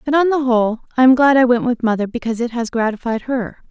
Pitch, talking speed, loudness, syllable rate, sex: 245 Hz, 260 wpm, -16 LUFS, 6.5 syllables/s, female